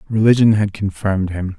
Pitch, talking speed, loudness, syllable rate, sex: 100 Hz, 150 wpm, -16 LUFS, 5.7 syllables/s, male